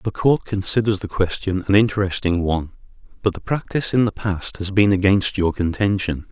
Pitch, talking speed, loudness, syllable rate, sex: 100 Hz, 180 wpm, -20 LUFS, 5.4 syllables/s, male